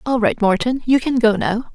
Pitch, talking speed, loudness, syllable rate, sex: 235 Hz, 240 wpm, -17 LUFS, 5.3 syllables/s, female